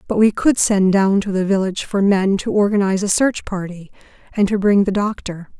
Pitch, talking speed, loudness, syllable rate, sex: 200 Hz, 215 wpm, -17 LUFS, 5.4 syllables/s, female